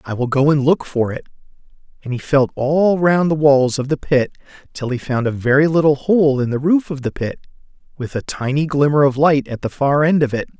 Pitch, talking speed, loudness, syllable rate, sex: 140 Hz, 240 wpm, -17 LUFS, 5.4 syllables/s, male